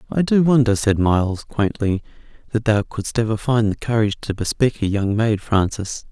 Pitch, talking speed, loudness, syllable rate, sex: 110 Hz, 185 wpm, -19 LUFS, 5.1 syllables/s, male